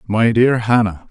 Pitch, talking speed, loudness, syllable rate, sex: 110 Hz, 165 wpm, -15 LUFS, 4.3 syllables/s, male